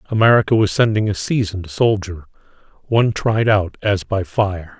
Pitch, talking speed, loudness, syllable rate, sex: 100 Hz, 150 wpm, -17 LUFS, 5.0 syllables/s, male